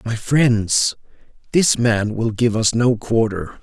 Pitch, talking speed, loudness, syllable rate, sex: 115 Hz, 150 wpm, -18 LUFS, 3.4 syllables/s, male